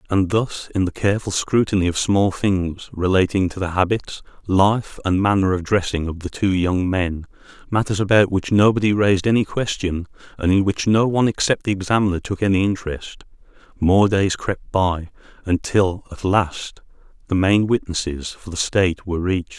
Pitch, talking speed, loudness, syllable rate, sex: 95 Hz, 165 wpm, -20 LUFS, 5.2 syllables/s, male